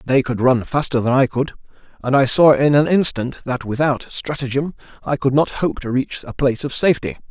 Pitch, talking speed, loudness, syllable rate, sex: 135 Hz, 215 wpm, -18 LUFS, 5.5 syllables/s, male